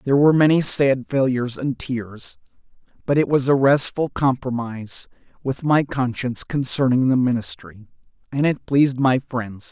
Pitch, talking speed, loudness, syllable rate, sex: 130 Hz, 150 wpm, -20 LUFS, 4.9 syllables/s, male